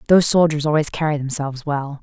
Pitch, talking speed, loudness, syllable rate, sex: 150 Hz, 175 wpm, -18 LUFS, 6.6 syllables/s, female